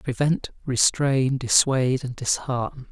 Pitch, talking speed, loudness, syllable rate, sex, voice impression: 130 Hz, 105 wpm, -22 LUFS, 4.0 syllables/s, male, slightly feminine, adult-like, dark, calm, slightly unique